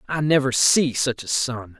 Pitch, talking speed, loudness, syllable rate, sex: 130 Hz, 200 wpm, -20 LUFS, 4.4 syllables/s, male